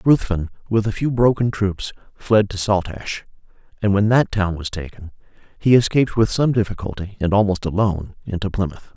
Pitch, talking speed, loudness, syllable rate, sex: 100 Hz, 165 wpm, -20 LUFS, 5.4 syllables/s, male